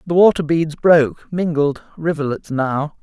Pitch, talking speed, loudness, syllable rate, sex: 155 Hz, 120 wpm, -17 LUFS, 4.4 syllables/s, male